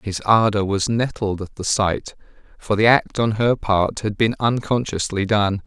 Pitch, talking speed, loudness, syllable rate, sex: 105 Hz, 180 wpm, -20 LUFS, 4.3 syllables/s, male